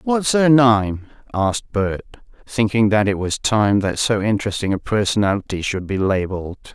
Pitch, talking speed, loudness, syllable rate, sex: 105 Hz, 160 wpm, -19 LUFS, 5.4 syllables/s, male